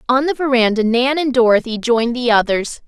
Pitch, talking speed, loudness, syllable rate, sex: 245 Hz, 190 wpm, -16 LUFS, 5.6 syllables/s, female